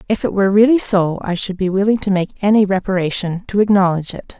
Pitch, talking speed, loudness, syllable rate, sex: 195 Hz, 205 wpm, -16 LUFS, 6.5 syllables/s, female